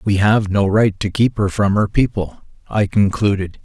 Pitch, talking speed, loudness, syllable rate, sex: 105 Hz, 200 wpm, -17 LUFS, 4.5 syllables/s, male